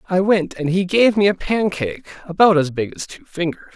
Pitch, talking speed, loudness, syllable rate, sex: 180 Hz, 225 wpm, -18 LUFS, 5.6 syllables/s, male